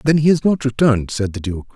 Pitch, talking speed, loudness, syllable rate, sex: 130 Hz, 275 wpm, -17 LUFS, 6.1 syllables/s, male